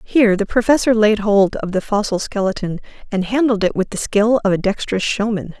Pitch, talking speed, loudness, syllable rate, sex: 210 Hz, 205 wpm, -17 LUFS, 5.7 syllables/s, female